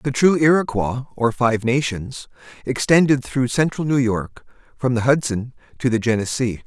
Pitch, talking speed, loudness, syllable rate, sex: 125 Hz, 155 wpm, -19 LUFS, 4.7 syllables/s, male